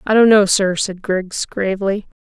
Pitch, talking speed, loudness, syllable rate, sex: 195 Hz, 190 wpm, -16 LUFS, 4.5 syllables/s, female